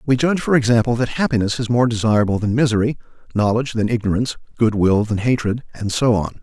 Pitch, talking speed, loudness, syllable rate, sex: 115 Hz, 185 wpm, -18 LUFS, 6.6 syllables/s, male